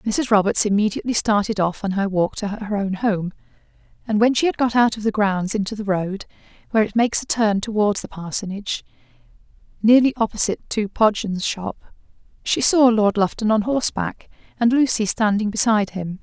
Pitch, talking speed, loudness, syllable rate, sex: 210 Hz, 175 wpm, -20 LUFS, 5.6 syllables/s, female